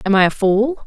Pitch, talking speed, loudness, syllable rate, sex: 215 Hz, 280 wpm, -16 LUFS, 5.5 syllables/s, female